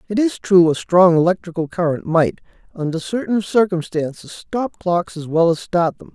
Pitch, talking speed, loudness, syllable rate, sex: 180 Hz, 175 wpm, -18 LUFS, 4.8 syllables/s, male